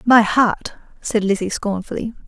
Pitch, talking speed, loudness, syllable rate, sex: 210 Hz, 130 wpm, -19 LUFS, 4.3 syllables/s, female